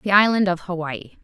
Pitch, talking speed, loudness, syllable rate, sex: 185 Hz, 195 wpm, -20 LUFS, 5.1 syllables/s, female